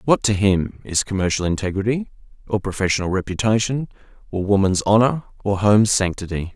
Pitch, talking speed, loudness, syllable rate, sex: 100 Hz, 135 wpm, -20 LUFS, 5.7 syllables/s, male